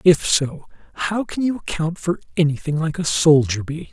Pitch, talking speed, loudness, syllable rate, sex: 155 Hz, 185 wpm, -20 LUFS, 4.9 syllables/s, male